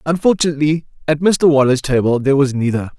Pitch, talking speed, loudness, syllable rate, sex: 145 Hz, 160 wpm, -15 LUFS, 6.5 syllables/s, male